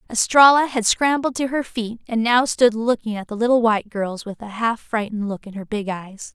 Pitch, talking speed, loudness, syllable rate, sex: 225 Hz, 225 wpm, -20 LUFS, 5.3 syllables/s, female